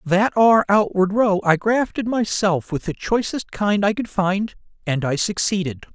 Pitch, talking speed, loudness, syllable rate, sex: 200 Hz, 170 wpm, -20 LUFS, 4.5 syllables/s, male